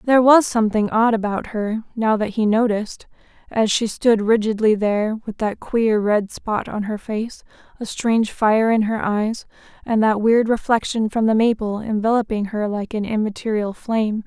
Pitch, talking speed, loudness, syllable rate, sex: 220 Hz, 175 wpm, -19 LUFS, 4.9 syllables/s, female